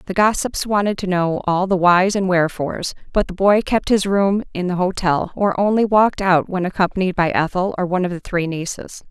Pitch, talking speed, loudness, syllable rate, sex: 185 Hz, 215 wpm, -18 LUFS, 5.5 syllables/s, female